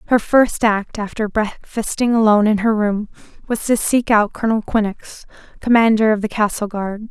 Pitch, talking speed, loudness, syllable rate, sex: 215 Hz, 170 wpm, -17 LUFS, 5.1 syllables/s, female